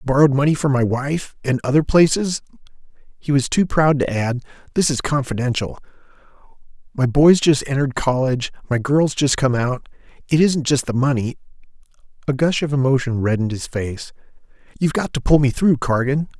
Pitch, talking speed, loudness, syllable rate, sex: 135 Hz, 155 wpm, -19 LUFS, 4.9 syllables/s, male